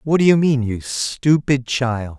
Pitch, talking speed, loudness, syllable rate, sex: 130 Hz, 190 wpm, -18 LUFS, 3.8 syllables/s, male